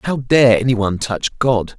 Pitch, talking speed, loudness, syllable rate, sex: 115 Hz, 200 wpm, -16 LUFS, 4.9 syllables/s, male